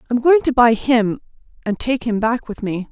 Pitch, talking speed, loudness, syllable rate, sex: 235 Hz, 225 wpm, -17 LUFS, 4.9 syllables/s, female